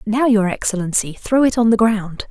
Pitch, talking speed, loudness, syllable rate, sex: 215 Hz, 210 wpm, -17 LUFS, 5.1 syllables/s, female